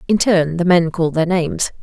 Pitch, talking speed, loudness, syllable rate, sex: 175 Hz, 230 wpm, -16 LUFS, 5.7 syllables/s, female